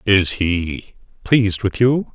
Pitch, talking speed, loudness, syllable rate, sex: 105 Hz, 140 wpm, -18 LUFS, 3.4 syllables/s, male